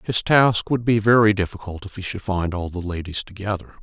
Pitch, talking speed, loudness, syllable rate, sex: 100 Hz, 220 wpm, -21 LUFS, 5.5 syllables/s, male